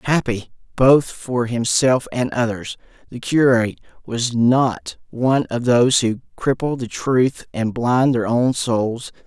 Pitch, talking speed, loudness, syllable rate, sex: 125 Hz, 150 wpm, -19 LUFS, 4.1 syllables/s, male